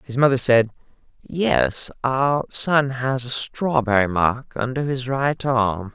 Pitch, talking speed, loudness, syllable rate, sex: 125 Hz, 140 wpm, -21 LUFS, 3.5 syllables/s, male